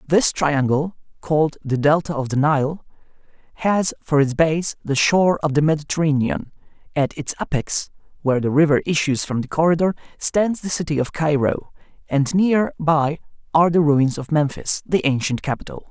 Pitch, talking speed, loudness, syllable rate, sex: 150 Hz, 160 wpm, -20 LUFS, 5.0 syllables/s, male